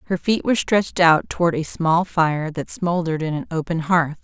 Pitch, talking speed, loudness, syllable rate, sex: 170 Hz, 210 wpm, -20 LUFS, 5.3 syllables/s, female